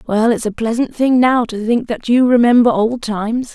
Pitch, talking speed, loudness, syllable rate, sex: 230 Hz, 220 wpm, -15 LUFS, 5.0 syllables/s, female